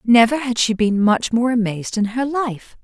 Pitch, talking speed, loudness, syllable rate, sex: 230 Hz, 210 wpm, -18 LUFS, 4.8 syllables/s, female